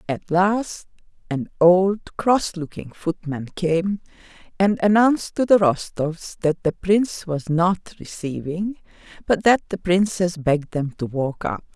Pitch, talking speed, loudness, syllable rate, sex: 175 Hz, 145 wpm, -21 LUFS, 4.0 syllables/s, female